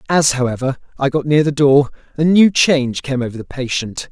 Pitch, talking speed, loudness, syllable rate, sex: 140 Hz, 205 wpm, -16 LUFS, 5.5 syllables/s, male